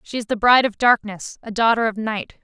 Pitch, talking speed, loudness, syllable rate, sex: 220 Hz, 245 wpm, -18 LUFS, 5.7 syllables/s, female